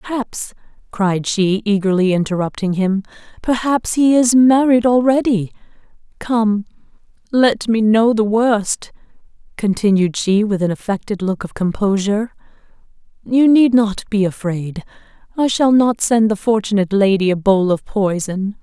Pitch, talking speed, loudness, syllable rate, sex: 210 Hz, 130 wpm, -16 LUFS, 4.5 syllables/s, female